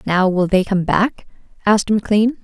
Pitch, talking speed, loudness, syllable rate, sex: 200 Hz, 175 wpm, -17 LUFS, 5.2 syllables/s, female